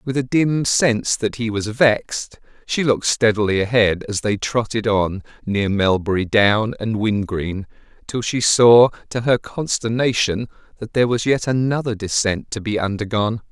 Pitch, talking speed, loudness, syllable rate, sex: 110 Hz, 160 wpm, -19 LUFS, 4.7 syllables/s, male